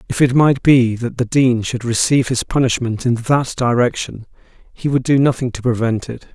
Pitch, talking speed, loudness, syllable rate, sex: 125 Hz, 200 wpm, -16 LUFS, 5.1 syllables/s, male